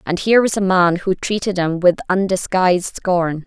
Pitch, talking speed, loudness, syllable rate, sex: 185 Hz, 190 wpm, -17 LUFS, 5.0 syllables/s, female